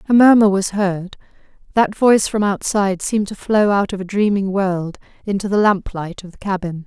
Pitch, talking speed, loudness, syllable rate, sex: 195 Hz, 200 wpm, -17 LUFS, 5.3 syllables/s, female